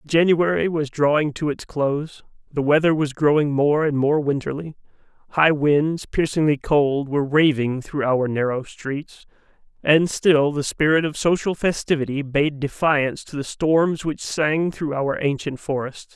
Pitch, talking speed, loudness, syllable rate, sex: 150 Hz, 155 wpm, -21 LUFS, 4.4 syllables/s, male